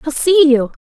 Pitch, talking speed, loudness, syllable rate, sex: 295 Hz, 215 wpm, -12 LUFS, 4.7 syllables/s, female